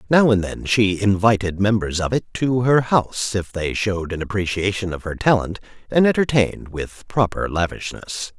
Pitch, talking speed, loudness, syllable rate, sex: 105 Hz, 170 wpm, -20 LUFS, 5.0 syllables/s, male